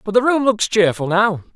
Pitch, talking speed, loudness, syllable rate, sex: 205 Hz, 230 wpm, -17 LUFS, 5.1 syllables/s, male